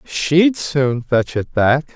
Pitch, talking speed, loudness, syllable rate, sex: 145 Hz, 155 wpm, -17 LUFS, 2.7 syllables/s, male